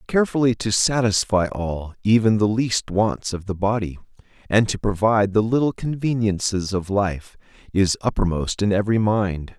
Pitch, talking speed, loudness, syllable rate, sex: 105 Hz, 150 wpm, -21 LUFS, 4.9 syllables/s, male